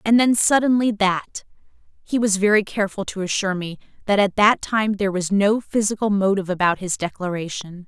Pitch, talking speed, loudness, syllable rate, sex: 200 Hz, 170 wpm, -20 LUFS, 5.6 syllables/s, female